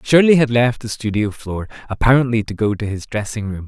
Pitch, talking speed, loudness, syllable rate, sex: 115 Hz, 210 wpm, -18 LUFS, 5.7 syllables/s, male